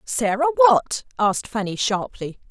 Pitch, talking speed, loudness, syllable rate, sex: 240 Hz, 120 wpm, -20 LUFS, 4.4 syllables/s, female